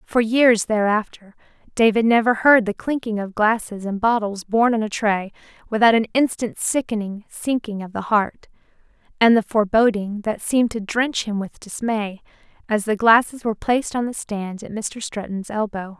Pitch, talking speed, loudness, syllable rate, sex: 215 Hz, 175 wpm, -20 LUFS, 5.0 syllables/s, female